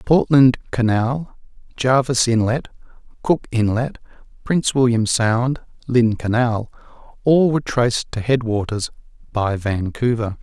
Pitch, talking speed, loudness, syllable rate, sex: 120 Hz, 105 wpm, -19 LUFS, 4.0 syllables/s, male